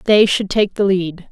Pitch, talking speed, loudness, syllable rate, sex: 195 Hz, 230 wpm, -16 LUFS, 4.3 syllables/s, female